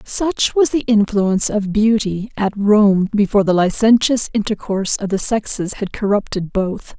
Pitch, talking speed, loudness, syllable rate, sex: 210 Hz, 155 wpm, -17 LUFS, 4.6 syllables/s, female